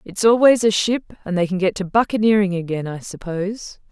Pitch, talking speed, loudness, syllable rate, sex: 195 Hz, 200 wpm, -19 LUFS, 5.4 syllables/s, female